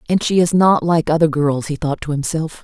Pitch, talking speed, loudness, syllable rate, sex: 160 Hz, 250 wpm, -17 LUFS, 5.3 syllables/s, female